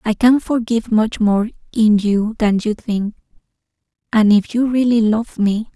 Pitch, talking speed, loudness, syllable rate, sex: 220 Hz, 165 wpm, -16 LUFS, 4.4 syllables/s, female